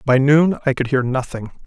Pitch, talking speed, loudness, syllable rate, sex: 135 Hz, 215 wpm, -17 LUFS, 5.2 syllables/s, male